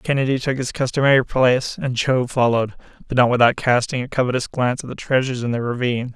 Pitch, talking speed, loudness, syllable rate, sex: 125 Hz, 205 wpm, -19 LUFS, 6.6 syllables/s, male